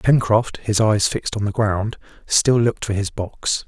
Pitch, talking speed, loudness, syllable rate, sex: 105 Hz, 195 wpm, -20 LUFS, 4.5 syllables/s, male